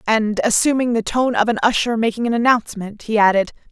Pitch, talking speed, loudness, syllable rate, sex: 225 Hz, 195 wpm, -17 LUFS, 6.0 syllables/s, female